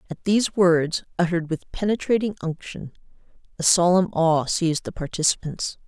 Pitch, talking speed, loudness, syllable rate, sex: 175 Hz, 135 wpm, -22 LUFS, 5.3 syllables/s, female